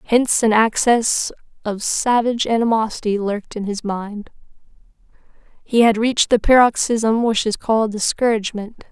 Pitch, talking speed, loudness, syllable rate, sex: 225 Hz, 130 wpm, -18 LUFS, 5.1 syllables/s, female